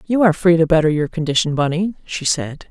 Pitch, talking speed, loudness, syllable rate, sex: 165 Hz, 220 wpm, -17 LUFS, 6.0 syllables/s, female